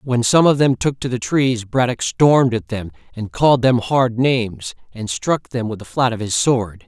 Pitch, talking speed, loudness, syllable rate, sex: 125 Hz, 235 wpm, -17 LUFS, 4.7 syllables/s, male